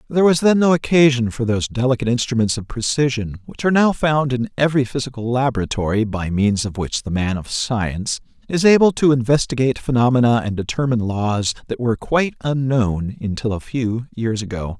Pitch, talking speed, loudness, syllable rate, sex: 125 Hz, 180 wpm, -19 LUFS, 5.8 syllables/s, male